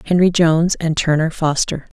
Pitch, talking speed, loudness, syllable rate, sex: 165 Hz, 150 wpm, -16 LUFS, 5.0 syllables/s, female